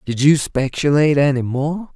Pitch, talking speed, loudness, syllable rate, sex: 145 Hz, 155 wpm, -17 LUFS, 5.0 syllables/s, male